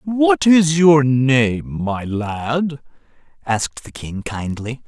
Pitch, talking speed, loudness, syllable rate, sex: 130 Hz, 125 wpm, -17 LUFS, 3.0 syllables/s, male